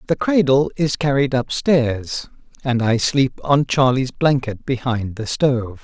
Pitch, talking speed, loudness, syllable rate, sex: 130 Hz, 145 wpm, -19 LUFS, 4.0 syllables/s, male